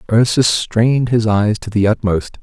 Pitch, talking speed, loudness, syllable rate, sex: 110 Hz, 175 wpm, -15 LUFS, 4.6 syllables/s, male